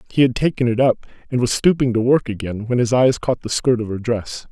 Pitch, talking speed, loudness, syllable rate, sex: 120 Hz, 265 wpm, -19 LUFS, 5.7 syllables/s, male